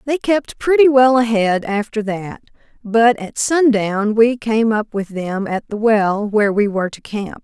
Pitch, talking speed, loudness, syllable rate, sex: 220 Hz, 185 wpm, -16 LUFS, 4.2 syllables/s, female